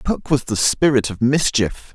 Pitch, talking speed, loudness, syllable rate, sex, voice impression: 130 Hz, 185 wpm, -18 LUFS, 4.3 syllables/s, male, very masculine, very adult-like, very middle-aged, thick, very tensed, powerful, bright, soft, slightly muffled, fluent, slightly raspy, very cool, intellectual, refreshing, very sincere, very calm, mature, very friendly, very reassuring, very unique, elegant, wild, sweet, very lively, kind, slightly intense, slightly modest